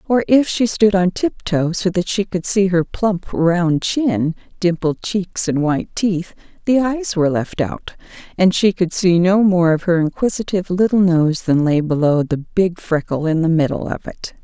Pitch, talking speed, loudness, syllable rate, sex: 180 Hz, 195 wpm, -17 LUFS, 4.5 syllables/s, female